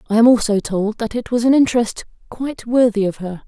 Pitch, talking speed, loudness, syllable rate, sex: 225 Hz, 225 wpm, -17 LUFS, 5.8 syllables/s, female